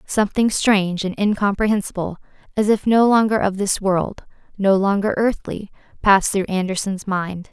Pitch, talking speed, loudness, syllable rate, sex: 200 Hz, 145 wpm, -19 LUFS, 5.1 syllables/s, female